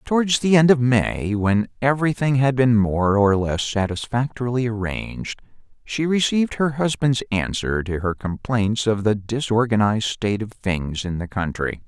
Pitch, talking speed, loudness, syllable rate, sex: 115 Hz, 155 wpm, -21 LUFS, 4.8 syllables/s, male